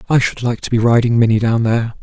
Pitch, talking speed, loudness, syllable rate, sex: 115 Hz, 265 wpm, -15 LUFS, 6.7 syllables/s, male